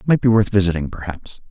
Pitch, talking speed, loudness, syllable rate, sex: 100 Hz, 200 wpm, -18 LUFS, 6.2 syllables/s, male